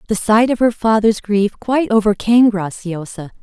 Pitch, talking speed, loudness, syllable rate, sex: 215 Hz, 155 wpm, -15 LUFS, 5.1 syllables/s, female